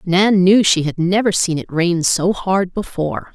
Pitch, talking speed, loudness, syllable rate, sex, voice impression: 180 Hz, 195 wpm, -16 LUFS, 4.3 syllables/s, female, very feminine, slightly young, slightly adult-like, very thin, very tensed, powerful, very bright, very hard, very clear, very fluent, cool, intellectual, very refreshing, very sincere, slightly calm, slightly friendly, slightly reassuring, very unique, slightly elegant, very wild, slightly sweet, very strict, very intense, very sharp, very light